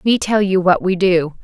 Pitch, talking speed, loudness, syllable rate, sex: 185 Hz, 250 wpm, -15 LUFS, 4.6 syllables/s, female